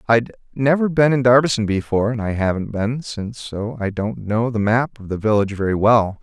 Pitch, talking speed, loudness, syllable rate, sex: 115 Hz, 210 wpm, -19 LUFS, 5.5 syllables/s, male